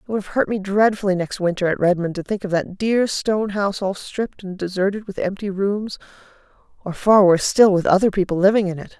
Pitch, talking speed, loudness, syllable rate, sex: 195 Hz, 225 wpm, -19 LUFS, 6.0 syllables/s, female